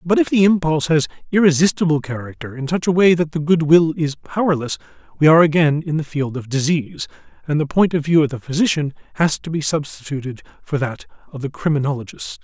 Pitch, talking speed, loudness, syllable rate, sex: 155 Hz, 205 wpm, -18 LUFS, 6.1 syllables/s, male